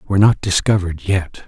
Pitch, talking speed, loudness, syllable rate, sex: 95 Hz, 160 wpm, -17 LUFS, 6.2 syllables/s, male